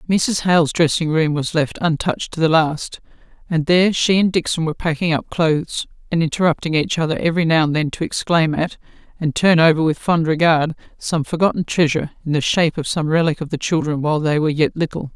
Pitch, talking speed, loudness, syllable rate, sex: 160 Hz, 210 wpm, -18 LUFS, 6.0 syllables/s, female